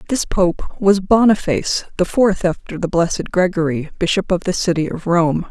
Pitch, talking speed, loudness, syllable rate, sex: 180 Hz, 175 wpm, -17 LUFS, 5.0 syllables/s, female